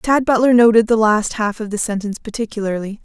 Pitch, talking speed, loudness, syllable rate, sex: 220 Hz, 195 wpm, -16 LUFS, 6.0 syllables/s, female